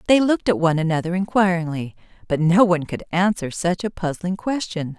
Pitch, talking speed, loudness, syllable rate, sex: 180 Hz, 180 wpm, -21 LUFS, 5.8 syllables/s, female